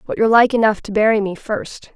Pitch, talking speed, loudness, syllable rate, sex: 215 Hz, 245 wpm, -16 LUFS, 6.0 syllables/s, female